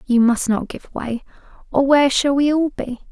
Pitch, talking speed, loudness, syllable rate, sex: 265 Hz, 210 wpm, -18 LUFS, 5.0 syllables/s, female